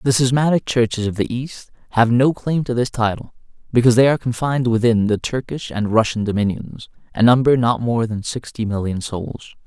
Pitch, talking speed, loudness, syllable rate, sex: 120 Hz, 185 wpm, -18 LUFS, 5.5 syllables/s, male